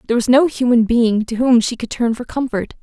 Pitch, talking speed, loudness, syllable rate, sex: 240 Hz, 255 wpm, -16 LUFS, 5.8 syllables/s, female